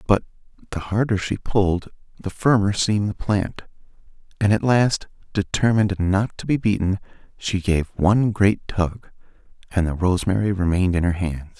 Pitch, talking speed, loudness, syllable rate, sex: 100 Hz, 155 wpm, -21 LUFS, 5.2 syllables/s, male